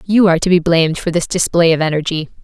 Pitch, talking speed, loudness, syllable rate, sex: 170 Hz, 245 wpm, -14 LUFS, 6.8 syllables/s, female